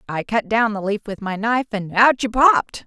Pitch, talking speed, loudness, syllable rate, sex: 220 Hz, 230 wpm, -19 LUFS, 5.3 syllables/s, female